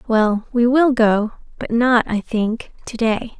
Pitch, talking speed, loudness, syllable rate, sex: 230 Hz, 175 wpm, -18 LUFS, 3.6 syllables/s, female